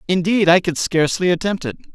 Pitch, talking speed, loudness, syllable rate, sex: 175 Hz, 185 wpm, -17 LUFS, 6.1 syllables/s, male